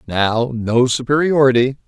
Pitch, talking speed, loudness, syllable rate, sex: 125 Hz, 95 wpm, -16 LUFS, 4.4 syllables/s, male